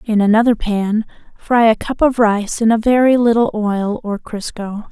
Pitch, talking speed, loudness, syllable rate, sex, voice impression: 220 Hz, 185 wpm, -15 LUFS, 4.5 syllables/s, female, feminine, slightly young, slightly soft, slightly cute, friendly, slightly kind